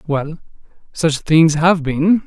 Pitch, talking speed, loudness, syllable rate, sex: 160 Hz, 135 wpm, -15 LUFS, 3.1 syllables/s, male